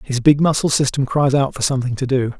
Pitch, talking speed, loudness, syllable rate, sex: 135 Hz, 250 wpm, -17 LUFS, 6.2 syllables/s, male